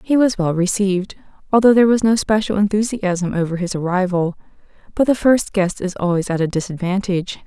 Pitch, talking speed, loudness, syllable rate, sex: 195 Hz, 175 wpm, -18 LUFS, 5.8 syllables/s, female